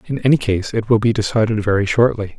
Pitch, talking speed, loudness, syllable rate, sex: 110 Hz, 225 wpm, -17 LUFS, 6.2 syllables/s, male